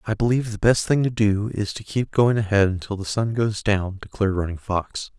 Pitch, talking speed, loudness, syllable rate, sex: 105 Hz, 230 wpm, -22 LUFS, 5.5 syllables/s, male